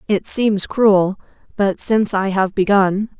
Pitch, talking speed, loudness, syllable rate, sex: 200 Hz, 150 wpm, -16 LUFS, 3.9 syllables/s, female